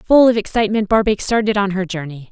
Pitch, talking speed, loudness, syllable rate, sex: 205 Hz, 210 wpm, -16 LUFS, 6.3 syllables/s, female